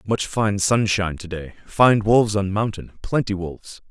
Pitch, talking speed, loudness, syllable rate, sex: 100 Hz, 155 wpm, -20 LUFS, 4.9 syllables/s, male